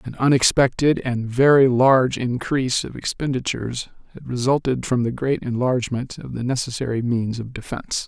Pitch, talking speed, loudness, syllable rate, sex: 125 Hz, 150 wpm, -21 LUFS, 5.3 syllables/s, male